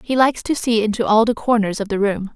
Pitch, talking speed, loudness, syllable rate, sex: 220 Hz, 280 wpm, -18 LUFS, 6.2 syllables/s, female